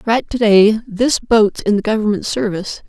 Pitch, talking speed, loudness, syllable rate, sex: 215 Hz, 190 wpm, -15 LUFS, 4.9 syllables/s, female